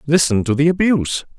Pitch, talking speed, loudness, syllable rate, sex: 150 Hz, 175 wpm, -16 LUFS, 6.1 syllables/s, male